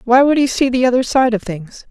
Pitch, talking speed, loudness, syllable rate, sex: 245 Hz, 285 wpm, -14 LUFS, 5.6 syllables/s, female